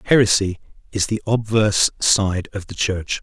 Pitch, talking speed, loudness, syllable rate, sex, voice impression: 100 Hz, 150 wpm, -19 LUFS, 4.8 syllables/s, male, very masculine, very middle-aged, very thick, very tensed, very powerful, bright, soft, slightly muffled, fluent, slightly raspy, very cool, very intellectual, refreshing, very sincere, calm, very mature, friendly, unique, elegant, wild, very sweet, lively, kind, slightly intense